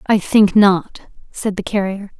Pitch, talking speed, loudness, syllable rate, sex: 200 Hz, 165 wpm, -16 LUFS, 4.0 syllables/s, female